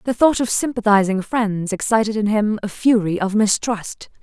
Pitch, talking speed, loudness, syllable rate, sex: 215 Hz, 170 wpm, -18 LUFS, 4.8 syllables/s, female